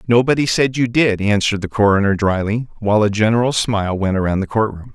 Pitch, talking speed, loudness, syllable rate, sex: 110 Hz, 195 wpm, -17 LUFS, 6.2 syllables/s, male